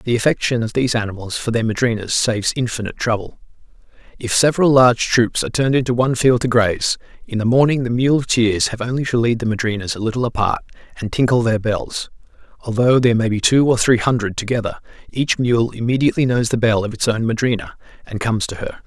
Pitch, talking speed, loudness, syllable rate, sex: 115 Hz, 200 wpm, -18 LUFS, 6.4 syllables/s, male